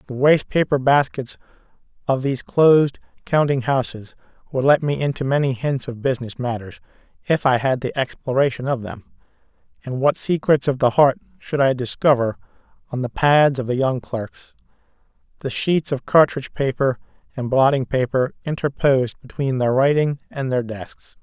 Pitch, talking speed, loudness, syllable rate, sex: 135 Hz, 155 wpm, -20 LUFS, 5.2 syllables/s, male